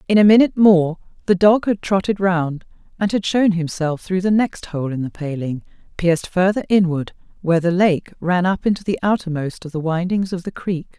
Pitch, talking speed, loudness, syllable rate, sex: 180 Hz, 200 wpm, -18 LUFS, 5.3 syllables/s, female